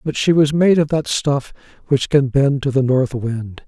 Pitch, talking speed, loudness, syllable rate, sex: 140 Hz, 230 wpm, -17 LUFS, 4.4 syllables/s, male